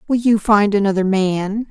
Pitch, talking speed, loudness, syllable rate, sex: 205 Hz, 175 wpm, -16 LUFS, 4.6 syllables/s, female